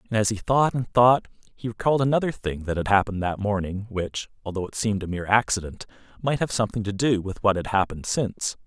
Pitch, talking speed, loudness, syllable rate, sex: 105 Hz, 220 wpm, -24 LUFS, 6.5 syllables/s, male